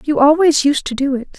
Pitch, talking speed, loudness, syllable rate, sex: 285 Hz, 260 wpm, -14 LUFS, 5.5 syllables/s, female